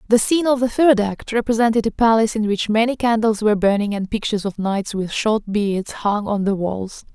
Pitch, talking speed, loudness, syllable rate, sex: 215 Hz, 220 wpm, -19 LUFS, 5.6 syllables/s, female